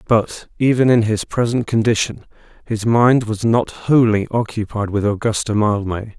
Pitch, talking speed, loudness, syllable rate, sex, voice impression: 110 Hz, 145 wpm, -17 LUFS, 4.6 syllables/s, male, very masculine, very adult-like, middle-aged, thick, tensed, slightly powerful, slightly dark, slightly muffled, fluent, very cool, very intellectual, slightly refreshing, sincere, calm, mature, friendly, reassuring, unique, elegant, slightly wild, sweet, lively, kind